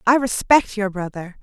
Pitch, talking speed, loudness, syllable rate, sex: 215 Hz, 170 wpm, -19 LUFS, 4.6 syllables/s, female